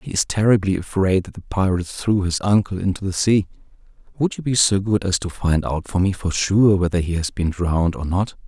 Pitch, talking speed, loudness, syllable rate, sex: 95 Hz, 240 wpm, -20 LUFS, 5.6 syllables/s, male